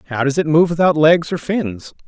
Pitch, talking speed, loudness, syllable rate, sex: 150 Hz, 230 wpm, -15 LUFS, 5.1 syllables/s, male